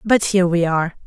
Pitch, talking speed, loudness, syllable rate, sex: 180 Hz, 225 wpm, -17 LUFS, 6.9 syllables/s, female